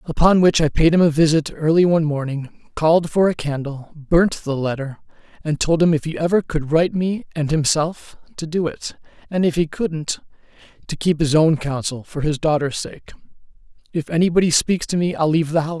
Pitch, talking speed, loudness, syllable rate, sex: 160 Hz, 195 wpm, -19 LUFS, 5.3 syllables/s, male